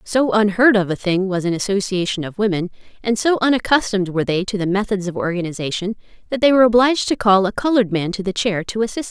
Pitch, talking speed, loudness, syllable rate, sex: 205 Hz, 230 wpm, -18 LUFS, 6.8 syllables/s, female